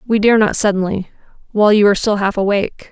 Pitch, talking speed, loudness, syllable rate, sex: 205 Hz, 185 wpm, -15 LUFS, 6.9 syllables/s, female